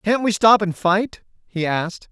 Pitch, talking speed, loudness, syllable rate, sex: 195 Hz, 200 wpm, -18 LUFS, 4.5 syllables/s, male